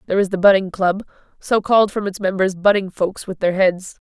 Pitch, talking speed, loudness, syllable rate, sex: 195 Hz, 220 wpm, -18 LUFS, 5.8 syllables/s, female